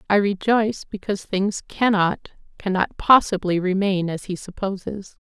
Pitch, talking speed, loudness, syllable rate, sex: 195 Hz, 125 wpm, -21 LUFS, 4.9 syllables/s, female